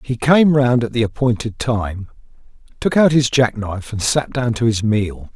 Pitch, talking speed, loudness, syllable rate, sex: 120 Hz, 190 wpm, -17 LUFS, 4.6 syllables/s, male